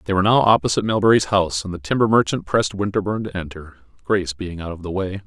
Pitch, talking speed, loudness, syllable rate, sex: 95 Hz, 230 wpm, -20 LUFS, 7.2 syllables/s, male